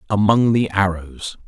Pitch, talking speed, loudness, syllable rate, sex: 100 Hz, 120 wpm, -18 LUFS, 4.1 syllables/s, male